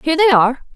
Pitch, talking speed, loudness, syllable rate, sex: 290 Hz, 235 wpm, -14 LUFS, 8.6 syllables/s, female